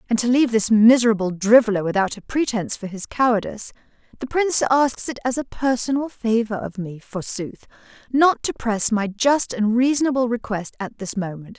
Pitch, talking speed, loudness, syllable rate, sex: 230 Hz, 175 wpm, -20 LUFS, 5.4 syllables/s, female